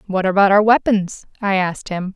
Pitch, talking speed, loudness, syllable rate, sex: 195 Hz, 195 wpm, -17 LUFS, 5.4 syllables/s, female